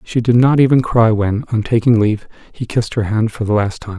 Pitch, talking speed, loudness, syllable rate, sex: 115 Hz, 255 wpm, -15 LUFS, 5.9 syllables/s, male